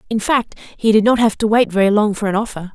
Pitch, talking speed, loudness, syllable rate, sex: 215 Hz, 285 wpm, -16 LUFS, 6.2 syllables/s, female